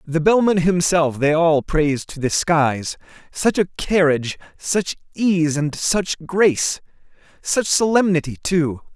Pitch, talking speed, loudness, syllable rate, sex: 165 Hz, 135 wpm, -19 LUFS, 4.0 syllables/s, male